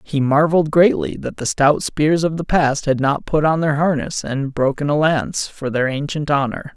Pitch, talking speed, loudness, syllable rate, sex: 150 Hz, 215 wpm, -18 LUFS, 4.8 syllables/s, male